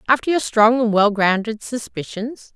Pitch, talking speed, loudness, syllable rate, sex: 225 Hz, 165 wpm, -18 LUFS, 4.6 syllables/s, female